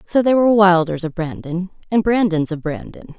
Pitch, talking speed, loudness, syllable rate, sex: 185 Hz, 190 wpm, -17 LUFS, 5.6 syllables/s, female